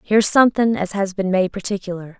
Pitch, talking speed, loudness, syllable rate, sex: 195 Hz, 190 wpm, -18 LUFS, 6.2 syllables/s, female